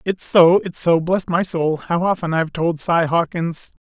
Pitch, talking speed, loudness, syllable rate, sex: 170 Hz, 205 wpm, -18 LUFS, 4.4 syllables/s, male